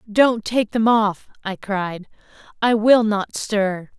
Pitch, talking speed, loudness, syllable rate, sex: 215 Hz, 150 wpm, -19 LUFS, 3.3 syllables/s, female